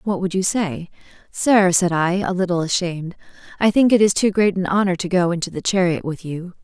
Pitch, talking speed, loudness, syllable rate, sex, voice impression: 180 Hz, 215 wpm, -19 LUFS, 5.0 syllables/s, female, feminine, slightly adult-like, fluent, calm, friendly, slightly sweet, kind